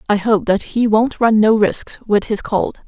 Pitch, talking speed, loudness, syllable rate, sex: 215 Hz, 230 wpm, -16 LUFS, 4.3 syllables/s, female